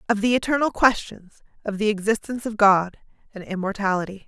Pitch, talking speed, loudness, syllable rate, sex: 210 Hz, 155 wpm, -22 LUFS, 6.1 syllables/s, female